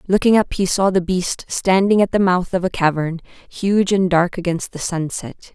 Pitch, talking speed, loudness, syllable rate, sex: 185 Hz, 205 wpm, -18 LUFS, 4.6 syllables/s, female